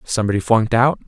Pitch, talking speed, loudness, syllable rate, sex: 110 Hz, 170 wpm, -17 LUFS, 7.6 syllables/s, male